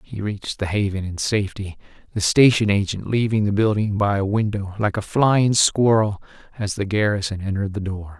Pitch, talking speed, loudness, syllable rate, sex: 100 Hz, 185 wpm, -20 LUFS, 5.3 syllables/s, male